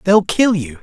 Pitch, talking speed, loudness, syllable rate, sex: 175 Hz, 220 wpm, -15 LUFS, 4.2 syllables/s, male